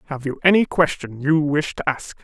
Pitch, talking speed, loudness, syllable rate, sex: 150 Hz, 215 wpm, -20 LUFS, 5.1 syllables/s, male